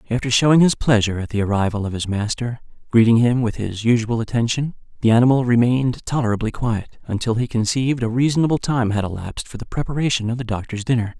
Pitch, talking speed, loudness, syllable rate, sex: 120 Hz, 195 wpm, -19 LUFS, 6.5 syllables/s, male